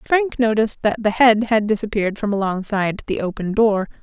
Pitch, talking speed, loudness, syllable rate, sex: 215 Hz, 180 wpm, -19 LUFS, 5.7 syllables/s, female